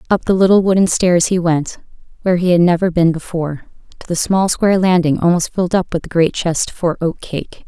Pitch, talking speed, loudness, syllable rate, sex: 175 Hz, 220 wpm, -15 LUFS, 5.7 syllables/s, female